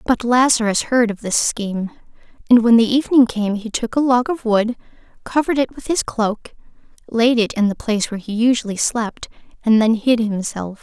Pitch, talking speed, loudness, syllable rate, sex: 230 Hz, 195 wpm, -18 LUFS, 5.4 syllables/s, female